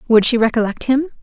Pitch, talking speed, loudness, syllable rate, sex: 240 Hz, 195 wpm, -16 LUFS, 6.3 syllables/s, female